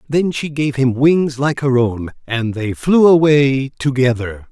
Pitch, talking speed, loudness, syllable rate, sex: 135 Hz, 175 wpm, -15 LUFS, 3.9 syllables/s, male